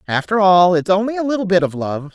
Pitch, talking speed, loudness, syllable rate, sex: 190 Hz, 250 wpm, -16 LUFS, 6.0 syllables/s, female